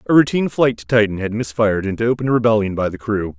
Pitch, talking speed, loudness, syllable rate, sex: 110 Hz, 230 wpm, -18 LUFS, 6.9 syllables/s, male